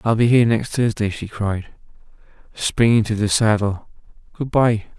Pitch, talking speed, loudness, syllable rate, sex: 110 Hz, 155 wpm, -19 LUFS, 4.7 syllables/s, male